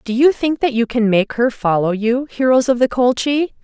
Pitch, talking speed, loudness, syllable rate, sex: 245 Hz, 230 wpm, -16 LUFS, 5.0 syllables/s, female